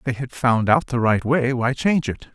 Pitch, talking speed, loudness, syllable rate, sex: 125 Hz, 280 wpm, -20 LUFS, 5.2 syllables/s, male